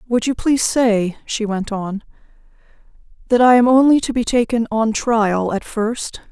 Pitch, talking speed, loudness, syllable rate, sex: 230 Hz, 170 wpm, -17 LUFS, 4.4 syllables/s, female